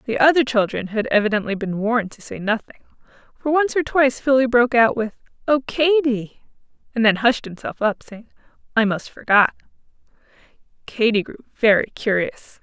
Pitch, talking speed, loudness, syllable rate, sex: 230 Hz, 155 wpm, -19 LUFS, 5.3 syllables/s, female